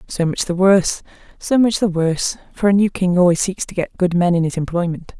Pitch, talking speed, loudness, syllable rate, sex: 180 Hz, 245 wpm, -17 LUFS, 5.7 syllables/s, female